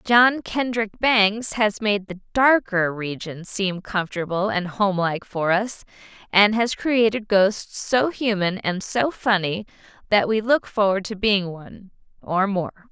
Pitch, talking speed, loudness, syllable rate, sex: 205 Hz, 145 wpm, -21 LUFS, 4.1 syllables/s, female